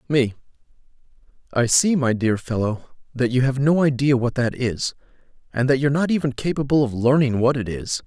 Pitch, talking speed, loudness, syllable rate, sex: 130 Hz, 185 wpm, -21 LUFS, 5.5 syllables/s, male